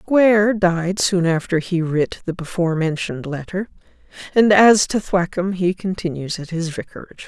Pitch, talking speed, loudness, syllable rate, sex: 180 Hz, 155 wpm, -19 LUFS, 4.9 syllables/s, female